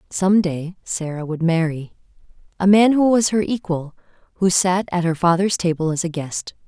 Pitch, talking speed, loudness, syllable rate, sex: 175 Hz, 170 wpm, -19 LUFS, 4.8 syllables/s, female